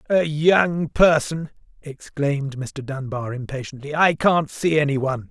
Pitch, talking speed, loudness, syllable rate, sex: 145 Hz, 135 wpm, -21 LUFS, 4.4 syllables/s, male